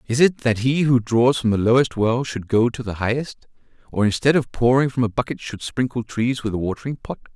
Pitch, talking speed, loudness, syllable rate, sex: 120 Hz, 235 wpm, -20 LUFS, 5.6 syllables/s, male